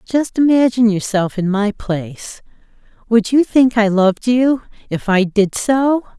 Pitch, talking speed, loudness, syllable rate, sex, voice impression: 225 Hz, 155 wpm, -15 LUFS, 4.4 syllables/s, female, feminine, very adult-like, intellectual, calm, slightly elegant